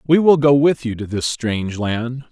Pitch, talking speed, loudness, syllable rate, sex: 130 Hz, 235 wpm, -17 LUFS, 4.7 syllables/s, male